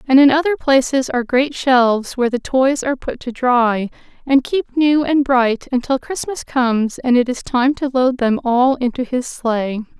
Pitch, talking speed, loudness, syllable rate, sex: 255 Hz, 200 wpm, -17 LUFS, 4.7 syllables/s, female